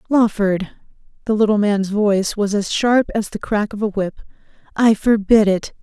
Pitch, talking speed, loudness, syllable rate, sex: 210 Hz, 175 wpm, -18 LUFS, 4.7 syllables/s, female